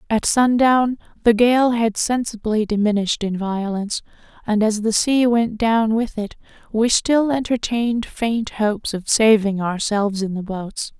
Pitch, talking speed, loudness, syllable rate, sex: 220 Hz, 155 wpm, -19 LUFS, 4.4 syllables/s, female